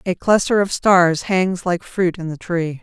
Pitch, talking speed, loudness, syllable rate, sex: 180 Hz, 210 wpm, -18 LUFS, 4.1 syllables/s, female